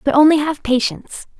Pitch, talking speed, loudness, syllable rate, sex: 280 Hz, 170 wpm, -16 LUFS, 5.8 syllables/s, female